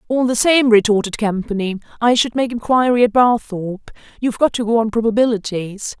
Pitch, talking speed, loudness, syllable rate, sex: 225 Hz, 170 wpm, -17 LUFS, 5.7 syllables/s, female